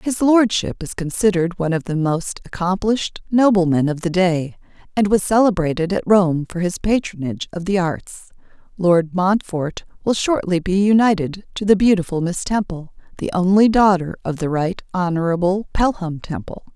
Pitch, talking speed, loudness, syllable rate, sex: 185 Hz, 160 wpm, -19 LUFS, 5.0 syllables/s, female